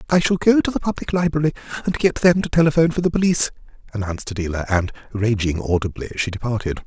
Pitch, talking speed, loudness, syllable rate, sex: 135 Hz, 190 wpm, -20 LUFS, 7.1 syllables/s, male